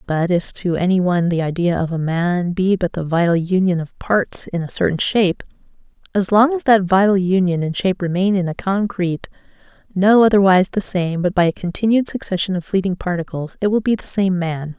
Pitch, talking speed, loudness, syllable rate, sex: 185 Hz, 205 wpm, -18 LUFS, 5.6 syllables/s, female